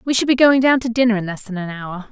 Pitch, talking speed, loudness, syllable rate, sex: 225 Hz, 340 wpm, -17 LUFS, 6.5 syllables/s, female